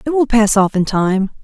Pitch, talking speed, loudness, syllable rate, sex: 220 Hz, 250 wpm, -14 LUFS, 4.9 syllables/s, female